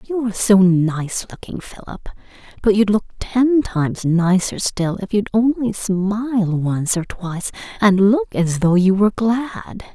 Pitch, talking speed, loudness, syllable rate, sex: 200 Hz, 165 wpm, -18 LUFS, 4.3 syllables/s, female